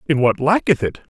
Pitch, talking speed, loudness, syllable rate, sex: 145 Hz, 205 wpm, -18 LUFS, 5.5 syllables/s, male